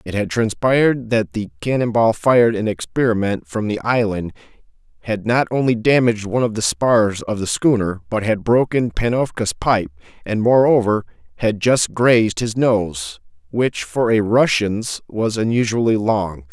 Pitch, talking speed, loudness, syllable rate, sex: 110 Hz, 155 wpm, -18 LUFS, 4.6 syllables/s, male